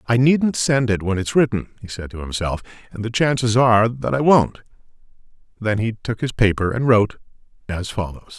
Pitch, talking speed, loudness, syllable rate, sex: 115 Hz, 195 wpm, -19 LUFS, 5.4 syllables/s, male